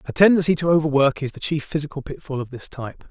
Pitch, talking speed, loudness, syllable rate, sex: 150 Hz, 230 wpm, -21 LUFS, 6.6 syllables/s, male